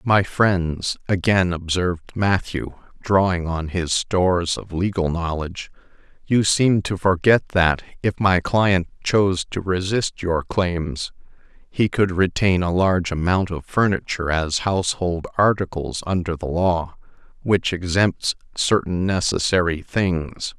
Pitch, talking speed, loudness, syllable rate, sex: 90 Hz, 130 wpm, -21 LUFS, 4.1 syllables/s, male